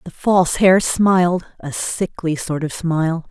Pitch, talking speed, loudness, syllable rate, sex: 175 Hz, 165 wpm, -18 LUFS, 4.3 syllables/s, female